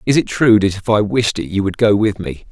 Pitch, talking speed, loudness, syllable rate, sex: 105 Hz, 310 wpm, -15 LUFS, 5.5 syllables/s, male